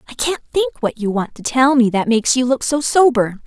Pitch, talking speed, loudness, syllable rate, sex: 255 Hz, 260 wpm, -16 LUFS, 5.6 syllables/s, female